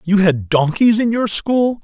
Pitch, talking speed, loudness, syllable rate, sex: 200 Hz, 195 wpm, -15 LUFS, 4.1 syllables/s, male